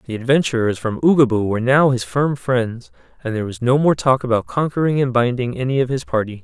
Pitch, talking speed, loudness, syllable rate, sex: 125 Hz, 215 wpm, -18 LUFS, 6.0 syllables/s, male